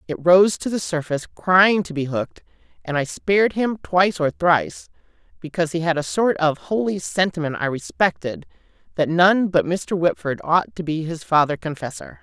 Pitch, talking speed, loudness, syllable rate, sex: 170 Hz, 180 wpm, -20 LUFS, 5.1 syllables/s, female